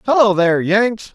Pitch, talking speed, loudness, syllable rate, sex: 205 Hz, 160 wpm, -15 LUFS, 5.0 syllables/s, male